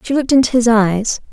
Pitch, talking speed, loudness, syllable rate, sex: 235 Hz, 225 wpm, -14 LUFS, 6.1 syllables/s, female